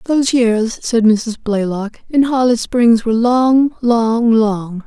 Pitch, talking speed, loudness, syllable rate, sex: 230 Hz, 150 wpm, -14 LUFS, 3.6 syllables/s, female